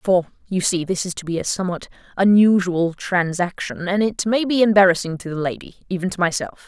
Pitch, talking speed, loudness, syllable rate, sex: 185 Hz, 200 wpm, -20 LUFS, 5.6 syllables/s, female